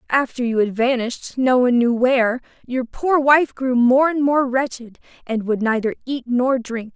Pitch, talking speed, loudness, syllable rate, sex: 250 Hz, 190 wpm, -19 LUFS, 4.8 syllables/s, female